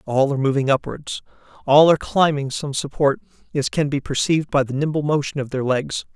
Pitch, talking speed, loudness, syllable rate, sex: 140 Hz, 195 wpm, -20 LUFS, 5.8 syllables/s, male